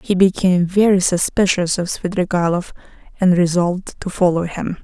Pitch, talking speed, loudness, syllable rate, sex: 180 Hz, 135 wpm, -17 LUFS, 5.2 syllables/s, female